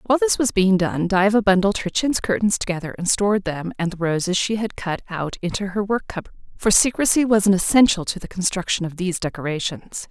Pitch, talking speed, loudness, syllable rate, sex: 195 Hz, 215 wpm, -20 LUFS, 5.9 syllables/s, female